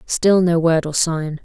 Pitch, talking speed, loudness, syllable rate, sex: 165 Hz, 210 wpm, -17 LUFS, 3.8 syllables/s, female